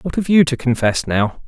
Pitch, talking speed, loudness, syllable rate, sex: 135 Hz, 245 wpm, -17 LUFS, 4.9 syllables/s, male